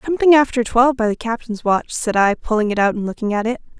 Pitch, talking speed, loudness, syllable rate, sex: 230 Hz, 255 wpm, -17 LUFS, 6.6 syllables/s, female